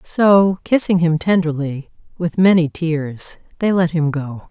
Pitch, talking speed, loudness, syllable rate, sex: 165 Hz, 145 wpm, -17 LUFS, 3.9 syllables/s, female